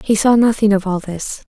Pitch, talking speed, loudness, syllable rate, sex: 205 Hz, 240 wpm, -16 LUFS, 5.2 syllables/s, female